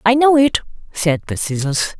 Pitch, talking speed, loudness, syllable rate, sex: 205 Hz, 180 wpm, -16 LUFS, 5.0 syllables/s, female